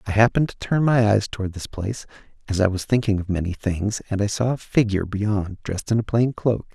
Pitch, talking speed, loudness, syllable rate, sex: 105 Hz, 240 wpm, -22 LUFS, 6.0 syllables/s, male